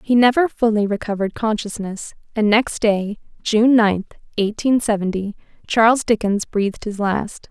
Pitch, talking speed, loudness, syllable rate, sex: 215 Hz, 135 wpm, -19 LUFS, 4.7 syllables/s, female